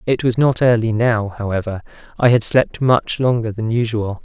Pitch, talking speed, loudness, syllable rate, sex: 115 Hz, 185 wpm, -17 LUFS, 4.9 syllables/s, male